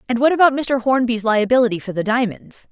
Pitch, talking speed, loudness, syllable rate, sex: 240 Hz, 200 wpm, -17 LUFS, 5.9 syllables/s, female